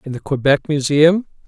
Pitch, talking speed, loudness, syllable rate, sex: 150 Hz, 160 wpm, -16 LUFS, 5.4 syllables/s, male